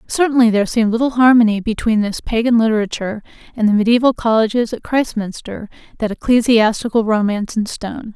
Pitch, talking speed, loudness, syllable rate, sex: 225 Hz, 145 wpm, -16 LUFS, 6.2 syllables/s, female